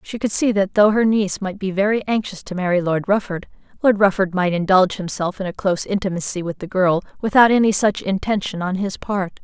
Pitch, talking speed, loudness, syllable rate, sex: 195 Hz, 215 wpm, -19 LUFS, 5.8 syllables/s, female